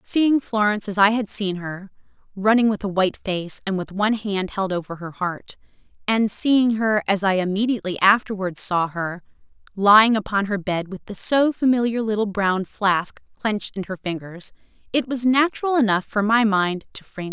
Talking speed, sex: 190 wpm, female